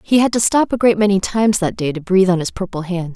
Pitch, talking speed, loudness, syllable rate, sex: 195 Hz, 305 wpm, -16 LUFS, 6.6 syllables/s, female